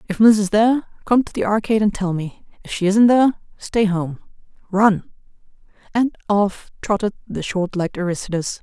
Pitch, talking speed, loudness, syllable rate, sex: 205 Hz, 175 wpm, -19 LUFS, 5.5 syllables/s, female